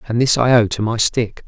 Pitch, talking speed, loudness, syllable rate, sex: 115 Hz, 285 wpm, -16 LUFS, 5.3 syllables/s, male